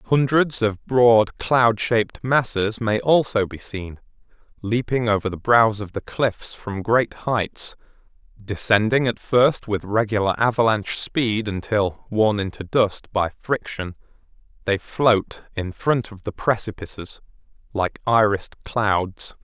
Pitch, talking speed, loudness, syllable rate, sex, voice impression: 110 Hz, 135 wpm, -21 LUFS, 3.9 syllables/s, male, masculine, adult-like, slightly halting, intellectual, refreshing